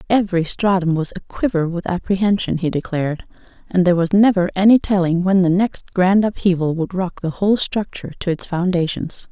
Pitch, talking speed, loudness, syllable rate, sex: 185 Hz, 175 wpm, -18 LUFS, 5.6 syllables/s, female